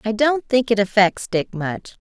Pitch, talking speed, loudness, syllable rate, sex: 215 Hz, 205 wpm, -19 LUFS, 4.3 syllables/s, female